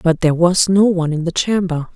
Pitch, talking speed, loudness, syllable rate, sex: 175 Hz, 245 wpm, -15 LUFS, 6.0 syllables/s, female